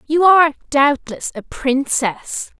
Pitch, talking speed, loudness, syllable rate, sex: 285 Hz, 115 wpm, -16 LUFS, 3.6 syllables/s, female